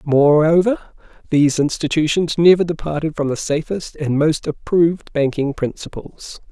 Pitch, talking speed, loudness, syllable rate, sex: 155 Hz, 120 wpm, -17 LUFS, 4.8 syllables/s, male